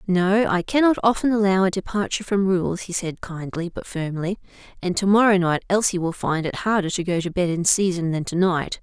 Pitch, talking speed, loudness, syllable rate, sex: 185 Hz, 220 wpm, -21 LUFS, 5.4 syllables/s, female